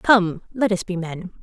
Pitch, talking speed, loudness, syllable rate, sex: 195 Hz, 210 wpm, -22 LUFS, 4.1 syllables/s, female